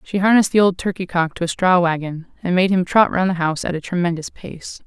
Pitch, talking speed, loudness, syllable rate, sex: 180 Hz, 260 wpm, -18 LUFS, 6.0 syllables/s, female